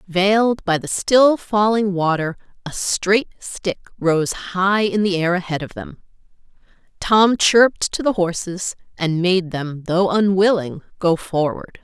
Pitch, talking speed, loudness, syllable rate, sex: 190 Hz, 145 wpm, -18 LUFS, 4.0 syllables/s, female